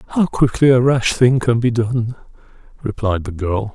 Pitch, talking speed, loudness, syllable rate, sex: 120 Hz, 175 wpm, -17 LUFS, 4.3 syllables/s, male